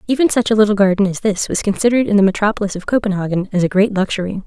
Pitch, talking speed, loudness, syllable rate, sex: 205 Hz, 240 wpm, -16 LUFS, 7.5 syllables/s, female